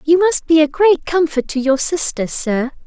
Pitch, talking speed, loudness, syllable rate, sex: 305 Hz, 210 wpm, -15 LUFS, 4.5 syllables/s, female